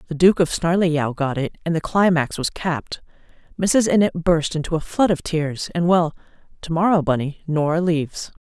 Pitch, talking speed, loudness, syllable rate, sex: 165 Hz, 180 wpm, -20 LUFS, 5.1 syllables/s, female